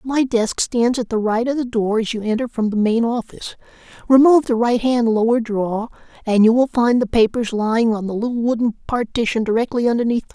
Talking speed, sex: 215 wpm, male